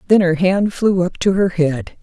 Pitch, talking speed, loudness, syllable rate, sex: 180 Hz, 235 wpm, -16 LUFS, 4.4 syllables/s, female